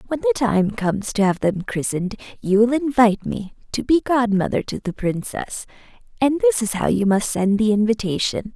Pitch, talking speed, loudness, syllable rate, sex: 225 Hz, 190 wpm, -20 LUFS, 5.3 syllables/s, female